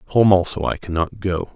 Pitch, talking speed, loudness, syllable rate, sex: 95 Hz, 190 wpm, -19 LUFS, 4.6 syllables/s, male